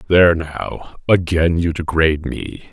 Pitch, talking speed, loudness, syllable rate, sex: 85 Hz, 130 wpm, -17 LUFS, 4.3 syllables/s, male